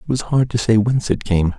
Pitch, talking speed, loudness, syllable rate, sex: 110 Hz, 305 wpm, -18 LUFS, 5.8 syllables/s, male